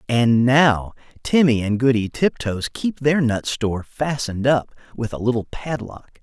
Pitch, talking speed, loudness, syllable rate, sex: 120 Hz, 155 wpm, -20 LUFS, 4.4 syllables/s, male